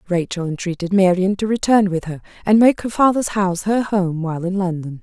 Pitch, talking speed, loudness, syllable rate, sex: 190 Hz, 205 wpm, -18 LUFS, 5.7 syllables/s, female